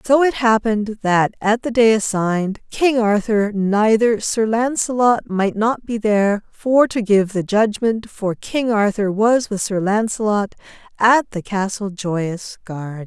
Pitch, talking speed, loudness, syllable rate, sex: 215 Hz, 155 wpm, -18 LUFS, 4.0 syllables/s, female